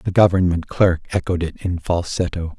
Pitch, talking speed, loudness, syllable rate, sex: 90 Hz, 160 wpm, -20 LUFS, 4.8 syllables/s, male